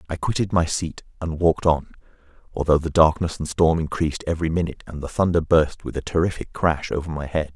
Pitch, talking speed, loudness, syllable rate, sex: 80 Hz, 205 wpm, -22 LUFS, 6.2 syllables/s, male